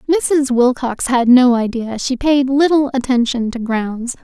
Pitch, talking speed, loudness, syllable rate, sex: 255 Hz, 155 wpm, -15 LUFS, 4.0 syllables/s, female